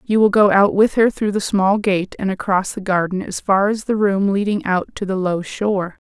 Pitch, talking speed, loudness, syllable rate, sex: 195 Hz, 245 wpm, -18 LUFS, 5.0 syllables/s, female